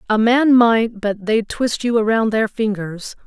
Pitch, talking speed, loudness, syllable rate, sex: 220 Hz, 185 wpm, -17 LUFS, 4.0 syllables/s, female